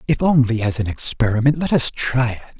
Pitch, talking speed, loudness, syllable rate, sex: 125 Hz, 210 wpm, -18 LUFS, 5.7 syllables/s, male